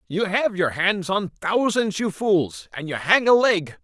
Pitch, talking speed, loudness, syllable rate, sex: 190 Hz, 205 wpm, -21 LUFS, 4.0 syllables/s, male